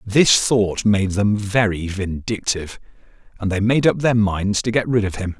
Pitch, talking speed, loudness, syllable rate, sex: 105 Hz, 190 wpm, -19 LUFS, 4.5 syllables/s, male